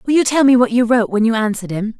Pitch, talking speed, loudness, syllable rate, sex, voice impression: 235 Hz, 330 wpm, -15 LUFS, 7.6 syllables/s, female, feminine, adult-like, tensed, powerful, bright, clear, intellectual, calm, friendly, lively, slightly strict